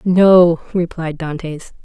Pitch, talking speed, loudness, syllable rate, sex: 170 Hz, 100 wpm, -14 LUFS, 3.2 syllables/s, female